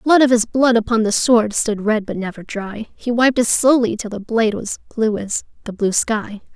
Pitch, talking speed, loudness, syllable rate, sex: 225 Hz, 230 wpm, -18 LUFS, 4.8 syllables/s, female